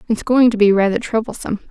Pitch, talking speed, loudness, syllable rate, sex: 220 Hz, 210 wpm, -16 LUFS, 6.7 syllables/s, female